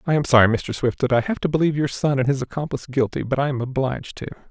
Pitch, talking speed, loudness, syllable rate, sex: 135 Hz, 280 wpm, -21 LUFS, 7.2 syllables/s, male